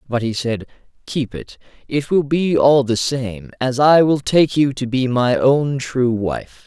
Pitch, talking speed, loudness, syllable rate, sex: 130 Hz, 200 wpm, -17 LUFS, 3.8 syllables/s, male